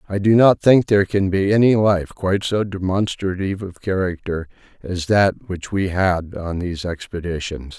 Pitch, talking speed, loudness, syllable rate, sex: 95 Hz, 170 wpm, -19 LUFS, 4.9 syllables/s, male